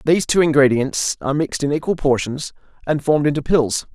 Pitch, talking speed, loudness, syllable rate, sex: 145 Hz, 180 wpm, -18 LUFS, 6.4 syllables/s, male